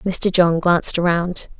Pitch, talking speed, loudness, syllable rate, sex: 175 Hz, 150 wpm, -18 LUFS, 3.4 syllables/s, female